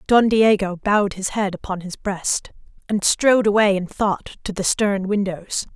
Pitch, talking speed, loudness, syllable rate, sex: 200 Hz, 175 wpm, -20 LUFS, 4.5 syllables/s, female